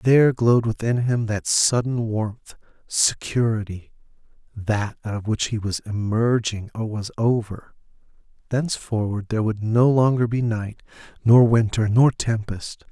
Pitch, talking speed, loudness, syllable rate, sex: 110 Hz, 125 wpm, -21 LUFS, 4.3 syllables/s, male